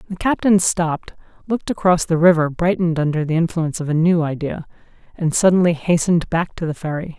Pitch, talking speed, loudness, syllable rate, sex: 165 Hz, 185 wpm, -18 LUFS, 6.2 syllables/s, female